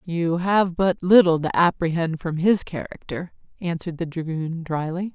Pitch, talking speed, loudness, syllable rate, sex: 170 Hz, 150 wpm, -22 LUFS, 4.6 syllables/s, female